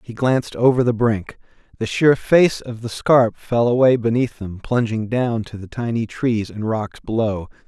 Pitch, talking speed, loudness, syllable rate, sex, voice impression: 115 Hz, 190 wpm, -19 LUFS, 4.5 syllables/s, male, masculine, adult-like, slightly soft, cool, slightly refreshing, sincere, slightly elegant